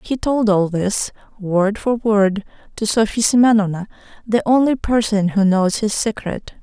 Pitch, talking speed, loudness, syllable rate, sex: 210 Hz, 155 wpm, -17 LUFS, 4.4 syllables/s, female